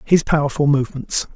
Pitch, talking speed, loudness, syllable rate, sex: 145 Hz, 130 wpm, -18 LUFS, 5.9 syllables/s, male